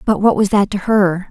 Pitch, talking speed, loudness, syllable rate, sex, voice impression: 200 Hz, 275 wpm, -15 LUFS, 5.0 syllables/s, female, feminine, middle-aged, tensed, powerful, slightly hard, clear, fluent, intellectual, calm, reassuring, elegant, lively, slightly modest